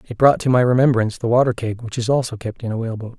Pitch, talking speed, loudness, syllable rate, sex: 120 Hz, 300 wpm, -19 LUFS, 7.2 syllables/s, male